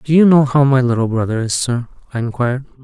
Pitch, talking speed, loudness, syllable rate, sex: 130 Hz, 235 wpm, -15 LUFS, 6.4 syllables/s, male